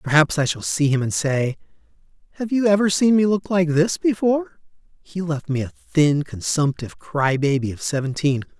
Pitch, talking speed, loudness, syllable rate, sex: 160 Hz, 180 wpm, -20 LUFS, 5.2 syllables/s, male